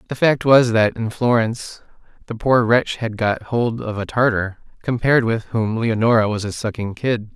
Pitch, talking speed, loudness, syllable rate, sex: 115 Hz, 190 wpm, -19 LUFS, 4.8 syllables/s, male